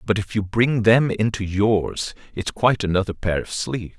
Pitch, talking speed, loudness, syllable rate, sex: 105 Hz, 195 wpm, -21 LUFS, 4.9 syllables/s, male